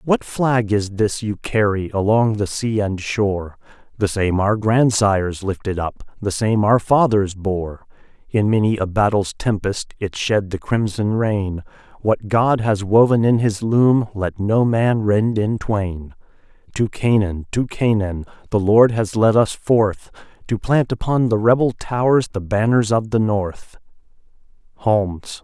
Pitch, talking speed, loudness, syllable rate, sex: 105 Hz, 160 wpm, -18 LUFS, 4.1 syllables/s, male